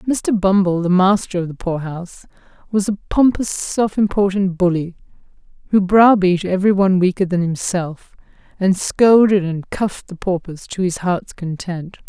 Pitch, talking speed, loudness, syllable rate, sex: 185 Hz, 150 wpm, -17 LUFS, 4.8 syllables/s, female